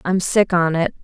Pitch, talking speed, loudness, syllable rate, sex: 175 Hz, 230 wpm, -17 LUFS, 4.5 syllables/s, female